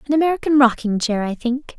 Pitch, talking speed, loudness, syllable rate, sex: 255 Hz, 200 wpm, -18 LUFS, 6.1 syllables/s, female